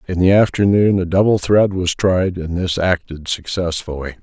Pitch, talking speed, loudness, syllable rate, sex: 90 Hz, 170 wpm, -17 LUFS, 4.8 syllables/s, male